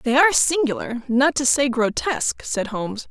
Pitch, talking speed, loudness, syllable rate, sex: 265 Hz, 175 wpm, -20 LUFS, 5.0 syllables/s, female